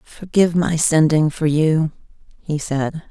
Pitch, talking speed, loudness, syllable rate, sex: 160 Hz, 135 wpm, -18 LUFS, 4.4 syllables/s, female